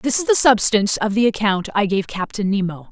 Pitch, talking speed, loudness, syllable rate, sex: 210 Hz, 225 wpm, -18 LUFS, 5.8 syllables/s, female